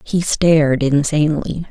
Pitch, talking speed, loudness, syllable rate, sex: 150 Hz, 105 wpm, -16 LUFS, 4.4 syllables/s, female